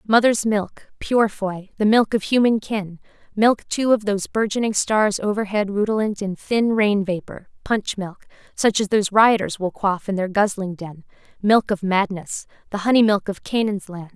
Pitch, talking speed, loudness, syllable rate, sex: 205 Hz, 165 wpm, -20 LUFS, 4.7 syllables/s, female